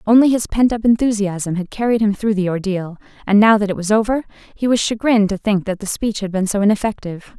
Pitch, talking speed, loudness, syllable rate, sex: 210 Hz, 235 wpm, -17 LUFS, 6.2 syllables/s, female